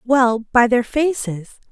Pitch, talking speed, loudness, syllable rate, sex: 240 Hz, 140 wpm, -17 LUFS, 3.5 syllables/s, female